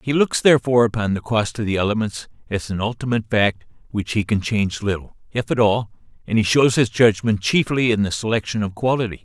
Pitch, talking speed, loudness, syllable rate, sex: 110 Hz, 210 wpm, -20 LUFS, 6.0 syllables/s, male